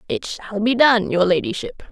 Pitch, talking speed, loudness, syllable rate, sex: 225 Hz, 190 wpm, -19 LUFS, 5.1 syllables/s, female